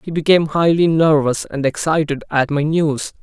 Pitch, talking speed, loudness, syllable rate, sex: 155 Hz, 170 wpm, -16 LUFS, 5.0 syllables/s, male